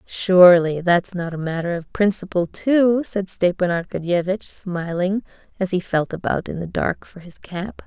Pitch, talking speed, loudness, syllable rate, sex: 185 Hz, 170 wpm, -20 LUFS, 4.5 syllables/s, female